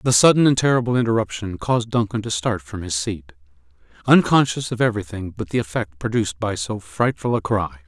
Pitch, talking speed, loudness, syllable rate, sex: 105 Hz, 185 wpm, -20 LUFS, 5.9 syllables/s, male